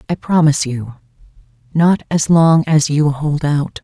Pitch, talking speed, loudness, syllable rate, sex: 150 Hz, 155 wpm, -15 LUFS, 4.2 syllables/s, female